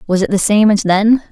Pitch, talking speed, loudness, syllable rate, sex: 205 Hz, 275 wpm, -13 LUFS, 5.5 syllables/s, female